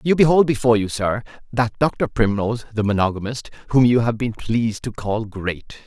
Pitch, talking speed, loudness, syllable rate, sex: 115 Hz, 185 wpm, -20 LUFS, 5.5 syllables/s, male